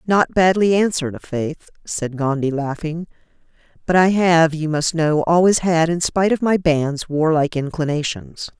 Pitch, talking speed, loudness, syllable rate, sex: 160 Hz, 155 wpm, -18 LUFS, 4.8 syllables/s, female